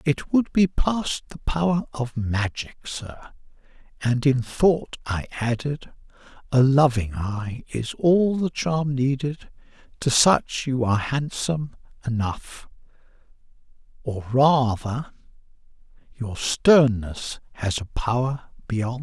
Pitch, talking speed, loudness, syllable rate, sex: 130 Hz, 115 wpm, -23 LUFS, 3.8 syllables/s, male